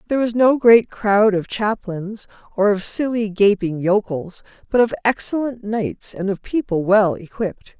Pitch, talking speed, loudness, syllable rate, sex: 210 Hz, 160 wpm, -19 LUFS, 4.5 syllables/s, female